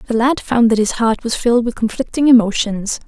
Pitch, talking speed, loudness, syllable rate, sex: 230 Hz, 215 wpm, -15 LUFS, 5.4 syllables/s, female